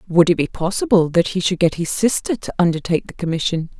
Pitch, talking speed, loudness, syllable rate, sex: 175 Hz, 220 wpm, -18 LUFS, 6.2 syllables/s, female